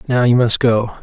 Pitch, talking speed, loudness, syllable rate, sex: 120 Hz, 235 wpm, -14 LUFS, 5.1 syllables/s, male